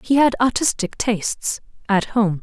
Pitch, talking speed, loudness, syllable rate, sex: 225 Hz, 125 wpm, -20 LUFS, 4.5 syllables/s, female